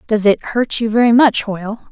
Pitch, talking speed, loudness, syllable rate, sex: 220 Hz, 220 wpm, -15 LUFS, 5.4 syllables/s, female